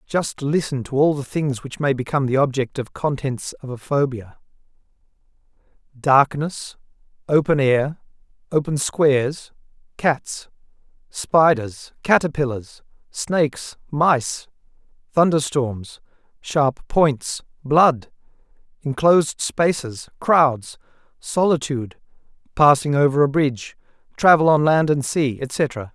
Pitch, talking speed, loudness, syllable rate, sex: 140 Hz, 105 wpm, -20 LUFS, 3.8 syllables/s, male